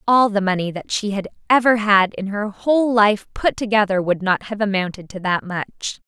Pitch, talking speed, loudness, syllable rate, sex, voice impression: 205 Hz, 210 wpm, -19 LUFS, 5.0 syllables/s, female, feminine, adult-like, slightly bright, slightly soft, clear, fluent, intellectual, calm, elegant, lively, slightly strict, slightly sharp